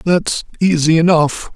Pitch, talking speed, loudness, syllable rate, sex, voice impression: 165 Hz, 115 wpm, -14 LUFS, 4.0 syllables/s, male, masculine, adult-like, tensed, powerful, bright, clear, slightly nasal, intellectual, friendly, unique, wild, lively, slightly intense